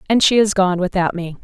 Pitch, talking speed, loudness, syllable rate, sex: 190 Hz, 250 wpm, -16 LUFS, 5.8 syllables/s, female